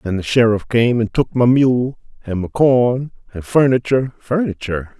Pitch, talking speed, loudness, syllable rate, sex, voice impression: 120 Hz, 155 wpm, -17 LUFS, 4.6 syllables/s, male, very masculine, middle-aged, thick, intellectual, calm, slightly mature, elegant